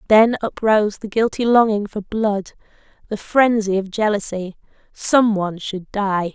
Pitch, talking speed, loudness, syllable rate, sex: 210 Hz, 125 wpm, -19 LUFS, 4.6 syllables/s, female